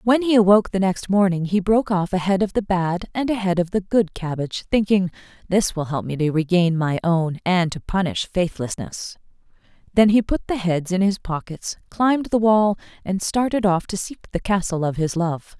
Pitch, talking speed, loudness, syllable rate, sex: 190 Hz, 210 wpm, -21 LUFS, 5.1 syllables/s, female